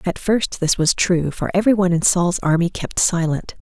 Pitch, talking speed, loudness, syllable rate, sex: 180 Hz, 215 wpm, -18 LUFS, 5.2 syllables/s, female